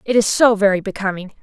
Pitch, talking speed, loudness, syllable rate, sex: 205 Hz, 210 wpm, -16 LUFS, 6.4 syllables/s, female